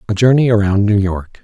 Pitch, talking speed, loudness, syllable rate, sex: 105 Hz, 210 wpm, -14 LUFS, 5.5 syllables/s, male